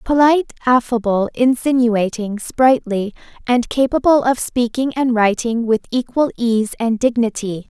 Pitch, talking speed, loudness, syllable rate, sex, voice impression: 240 Hz, 115 wpm, -17 LUFS, 4.4 syllables/s, female, very feminine, young, slightly tensed, slightly bright, cute, refreshing, slightly friendly